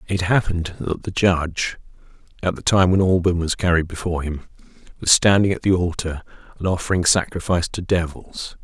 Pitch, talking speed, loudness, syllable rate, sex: 90 Hz, 165 wpm, -20 LUFS, 5.7 syllables/s, male